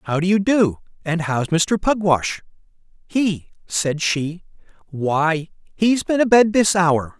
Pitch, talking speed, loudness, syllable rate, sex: 180 Hz, 140 wpm, -19 LUFS, 3.6 syllables/s, male